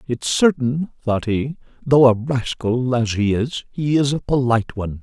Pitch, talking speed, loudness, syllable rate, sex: 125 Hz, 165 wpm, -19 LUFS, 4.4 syllables/s, male